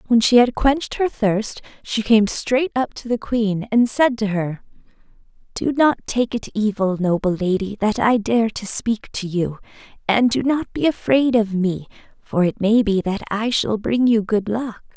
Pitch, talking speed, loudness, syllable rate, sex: 220 Hz, 195 wpm, -19 LUFS, 4.3 syllables/s, female